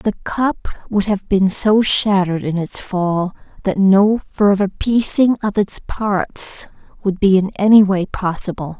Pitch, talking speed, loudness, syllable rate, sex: 195 Hz, 155 wpm, -17 LUFS, 3.8 syllables/s, female